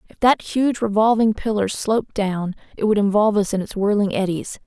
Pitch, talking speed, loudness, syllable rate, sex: 210 Hz, 195 wpm, -20 LUFS, 5.5 syllables/s, female